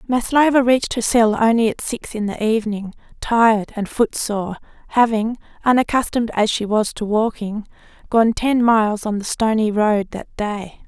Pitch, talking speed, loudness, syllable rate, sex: 220 Hz, 160 wpm, -18 LUFS, 4.9 syllables/s, female